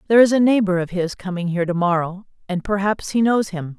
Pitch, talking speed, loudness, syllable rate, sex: 190 Hz, 240 wpm, -19 LUFS, 6.2 syllables/s, female